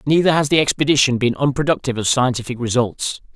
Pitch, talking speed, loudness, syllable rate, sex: 130 Hz, 160 wpm, -18 LUFS, 6.4 syllables/s, male